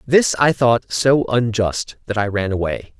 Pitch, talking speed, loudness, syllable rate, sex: 115 Hz, 180 wpm, -18 LUFS, 4.1 syllables/s, male